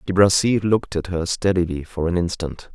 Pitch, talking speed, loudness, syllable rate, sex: 90 Hz, 195 wpm, -21 LUFS, 5.3 syllables/s, male